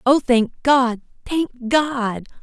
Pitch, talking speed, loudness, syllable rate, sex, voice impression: 250 Hz, 125 wpm, -19 LUFS, 2.6 syllables/s, female, feminine, adult-like, slightly clear, intellectual, slightly calm, slightly elegant